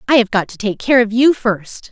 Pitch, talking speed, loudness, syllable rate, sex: 225 Hz, 280 wpm, -15 LUFS, 5.2 syllables/s, female